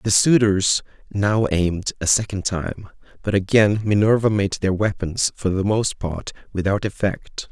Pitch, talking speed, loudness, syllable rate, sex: 100 Hz, 150 wpm, -20 LUFS, 4.3 syllables/s, male